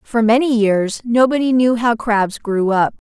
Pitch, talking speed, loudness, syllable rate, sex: 230 Hz, 175 wpm, -16 LUFS, 4.2 syllables/s, female